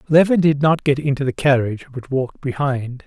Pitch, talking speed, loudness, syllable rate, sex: 140 Hz, 195 wpm, -18 LUFS, 5.7 syllables/s, male